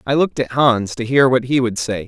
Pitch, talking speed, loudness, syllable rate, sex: 120 Hz, 290 wpm, -17 LUFS, 5.6 syllables/s, male